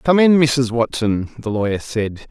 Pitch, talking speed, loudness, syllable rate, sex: 125 Hz, 180 wpm, -18 LUFS, 4.6 syllables/s, male